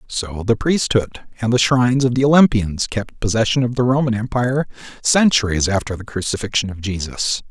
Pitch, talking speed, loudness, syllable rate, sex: 115 Hz, 170 wpm, -18 LUFS, 5.3 syllables/s, male